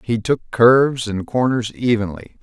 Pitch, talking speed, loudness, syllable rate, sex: 115 Hz, 150 wpm, -17 LUFS, 4.3 syllables/s, male